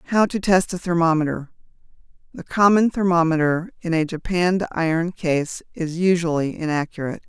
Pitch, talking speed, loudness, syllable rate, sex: 170 Hz, 125 wpm, -21 LUFS, 5.4 syllables/s, female